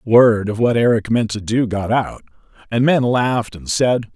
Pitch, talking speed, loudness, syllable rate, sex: 115 Hz, 200 wpm, -17 LUFS, 4.5 syllables/s, male